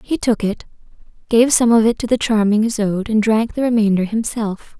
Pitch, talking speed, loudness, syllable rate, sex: 220 Hz, 200 wpm, -17 LUFS, 5.4 syllables/s, female